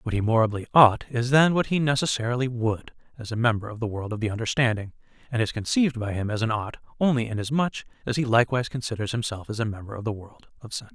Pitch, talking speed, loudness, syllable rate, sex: 115 Hz, 230 wpm, -25 LUFS, 6.8 syllables/s, male